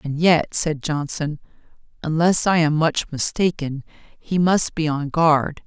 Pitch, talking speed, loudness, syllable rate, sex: 155 Hz, 150 wpm, -20 LUFS, 3.9 syllables/s, female